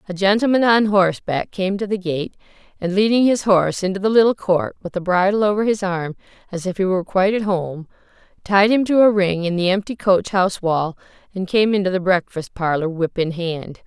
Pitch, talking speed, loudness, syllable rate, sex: 190 Hz, 210 wpm, -18 LUFS, 5.5 syllables/s, female